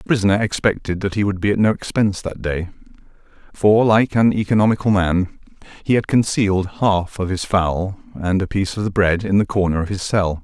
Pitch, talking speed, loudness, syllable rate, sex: 100 Hz, 205 wpm, -18 LUFS, 5.6 syllables/s, male